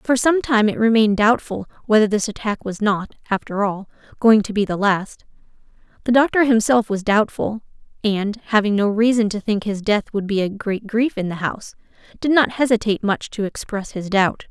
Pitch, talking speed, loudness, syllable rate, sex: 215 Hz, 195 wpm, -19 LUFS, 5.2 syllables/s, female